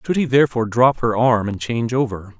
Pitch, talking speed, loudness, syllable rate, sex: 120 Hz, 225 wpm, -18 LUFS, 6.3 syllables/s, male